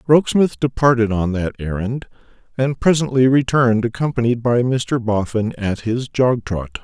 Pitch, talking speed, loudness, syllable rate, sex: 120 Hz, 140 wpm, -18 LUFS, 4.8 syllables/s, male